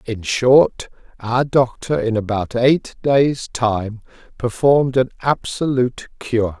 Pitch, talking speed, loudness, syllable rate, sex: 120 Hz, 120 wpm, -18 LUFS, 3.5 syllables/s, male